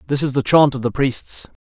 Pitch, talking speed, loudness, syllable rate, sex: 135 Hz, 250 wpm, -17 LUFS, 5.3 syllables/s, male